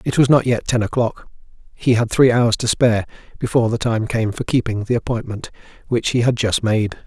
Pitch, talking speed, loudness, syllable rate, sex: 115 Hz, 205 wpm, -18 LUFS, 5.6 syllables/s, male